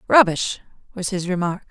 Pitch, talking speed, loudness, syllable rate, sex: 190 Hz, 140 wpm, -21 LUFS, 5.0 syllables/s, female